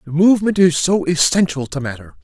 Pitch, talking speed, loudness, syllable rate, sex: 165 Hz, 160 wpm, -16 LUFS, 5.3 syllables/s, male